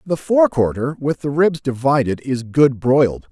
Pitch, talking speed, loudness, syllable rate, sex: 140 Hz, 180 wpm, -17 LUFS, 4.5 syllables/s, male